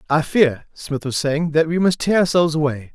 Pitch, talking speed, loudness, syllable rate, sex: 155 Hz, 245 wpm, -18 LUFS, 5.6 syllables/s, male